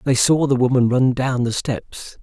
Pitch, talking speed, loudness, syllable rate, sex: 130 Hz, 215 wpm, -18 LUFS, 4.3 syllables/s, male